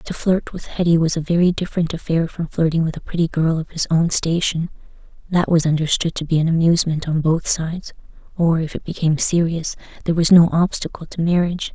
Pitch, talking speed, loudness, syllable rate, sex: 165 Hz, 205 wpm, -19 LUFS, 6.0 syllables/s, female